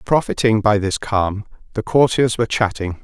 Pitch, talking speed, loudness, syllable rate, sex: 110 Hz, 160 wpm, -18 LUFS, 4.9 syllables/s, male